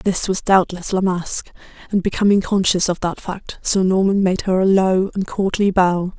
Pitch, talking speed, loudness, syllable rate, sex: 190 Hz, 195 wpm, -18 LUFS, 4.7 syllables/s, female